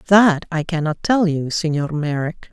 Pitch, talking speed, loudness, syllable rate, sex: 165 Hz, 165 wpm, -19 LUFS, 4.4 syllables/s, female